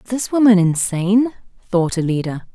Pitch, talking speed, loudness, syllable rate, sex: 200 Hz, 140 wpm, -17 LUFS, 5.4 syllables/s, female